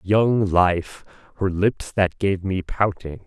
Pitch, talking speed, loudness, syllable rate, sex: 95 Hz, 145 wpm, -21 LUFS, 3.2 syllables/s, male